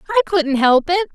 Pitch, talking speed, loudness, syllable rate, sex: 335 Hz, 210 wpm, -16 LUFS, 4.8 syllables/s, female